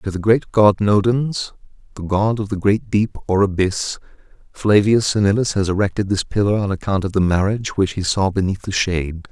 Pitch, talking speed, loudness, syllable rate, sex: 100 Hz, 195 wpm, -18 LUFS, 4.5 syllables/s, male